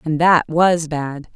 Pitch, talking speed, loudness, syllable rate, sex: 160 Hz, 175 wpm, -16 LUFS, 3.4 syllables/s, female